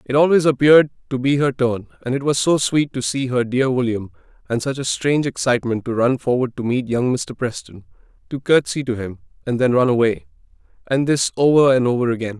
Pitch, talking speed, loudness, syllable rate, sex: 130 Hz, 215 wpm, -18 LUFS, 5.8 syllables/s, male